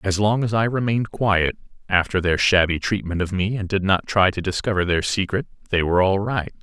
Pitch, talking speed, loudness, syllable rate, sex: 95 Hz, 215 wpm, -21 LUFS, 5.7 syllables/s, male